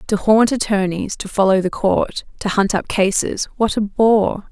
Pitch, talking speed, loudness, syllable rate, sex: 205 Hz, 175 wpm, -17 LUFS, 4.4 syllables/s, female